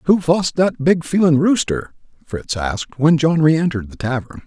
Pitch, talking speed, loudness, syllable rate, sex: 150 Hz, 175 wpm, -17 LUFS, 5.2 syllables/s, male